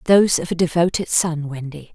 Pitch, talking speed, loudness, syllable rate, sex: 165 Hz, 185 wpm, -19 LUFS, 5.6 syllables/s, female